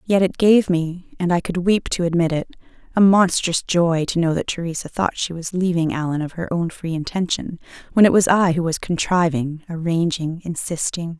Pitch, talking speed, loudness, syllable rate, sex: 170 Hz, 200 wpm, -20 LUFS, 5.1 syllables/s, female